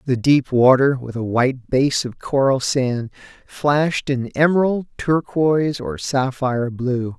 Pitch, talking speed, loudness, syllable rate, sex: 130 Hz, 140 wpm, -19 LUFS, 4.1 syllables/s, male